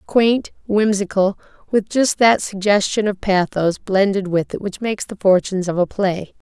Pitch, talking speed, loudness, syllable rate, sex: 200 Hz, 165 wpm, -18 LUFS, 4.7 syllables/s, female